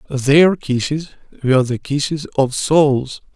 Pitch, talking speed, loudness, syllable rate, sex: 140 Hz, 125 wpm, -16 LUFS, 3.9 syllables/s, male